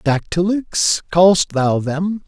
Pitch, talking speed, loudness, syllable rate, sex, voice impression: 170 Hz, 105 wpm, -16 LUFS, 2.8 syllables/s, male, very masculine, slightly old, mature, slightly elegant, sweet